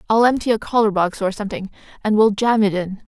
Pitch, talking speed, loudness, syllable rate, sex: 210 Hz, 230 wpm, -18 LUFS, 6.2 syllables/s, female